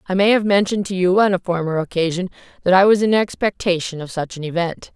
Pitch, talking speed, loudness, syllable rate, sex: 185 Hz, 230 wpm, -18 LUFS, 6.3 syllables/s, female